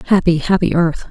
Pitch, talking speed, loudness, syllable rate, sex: 170 Hz, 165 wpm, -15 LUFS, 5.6 syllables/s, female